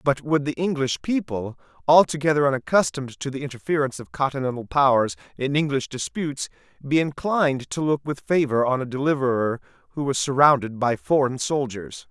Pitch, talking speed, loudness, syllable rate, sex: 135 Hz, 155 wpm, -23 LUFS, 5.7 syllables/s, male